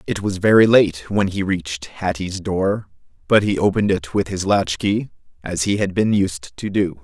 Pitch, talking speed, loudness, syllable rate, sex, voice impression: 95 Hz, 205 wpm, -19 LUFS, 4.7 syllables/s, male, masculine, adult-like, slightly old, thick, tensed, powerful, bright, slightly soft, clear, fluent, slightly raspy, very cool, intellectual, very refreshing, very sincere, calm, slightly mature, very friendly, very reassuring, very unique, very elegant, wild, very sweet, very lively, kind, slightly modest, slightly light